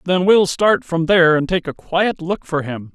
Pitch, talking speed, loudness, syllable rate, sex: 170 Hz, 245 wpm, -17 LUFS, 4.7 syllables/s, male